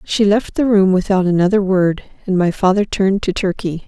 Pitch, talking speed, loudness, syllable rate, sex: 190 Hz, 200 wpm, -16 LUFS, 5.4 syllables/s, female